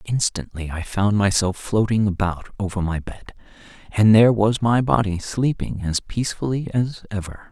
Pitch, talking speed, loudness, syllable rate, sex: 105 Hz, 150 wpm, -21 LUFS, 4.7 syllables/s, male